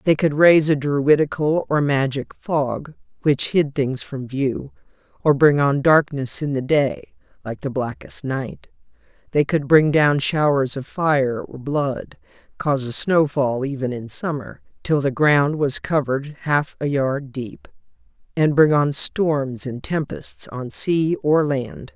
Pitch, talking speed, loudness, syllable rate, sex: 140 Hz, 160 wpm, -20 LUFS, 3.8 syllables/s, female